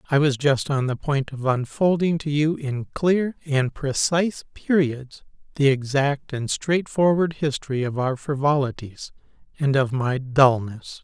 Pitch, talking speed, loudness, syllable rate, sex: 140 Hz, 145 wpm, -22 LUFS, 4.2 syllables/s, male